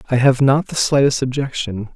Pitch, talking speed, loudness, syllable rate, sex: 130 Hz, 185 wpm, -17 LUFS, 5.3 syllables/s, male